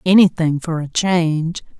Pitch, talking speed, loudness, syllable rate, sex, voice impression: 165 Hz, 135 wpm, -17 LUFS, 4.5 syllables/s, female, feminine, middle-aged, relaxed, weak, slightly soft, raspy, slightly intellectual, calm, slightly elegant, slightly kind, modest